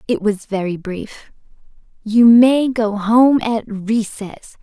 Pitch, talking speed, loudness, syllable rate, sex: 220 Hz, 130 wpm, -15 LUFS, 3.2 syllables/s, female